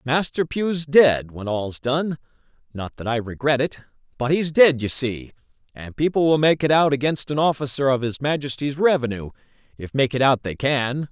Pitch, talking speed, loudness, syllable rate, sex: 135 Hz, 190 wpm, -21 LUFS, 4.9 syllables/s, male